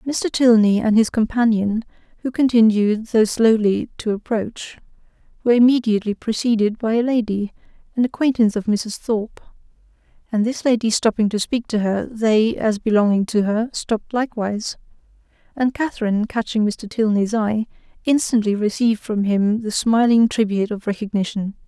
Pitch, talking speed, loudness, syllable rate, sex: 220 Hz, 145 wpm, -19 LUFS, 5.2 syllables/s, female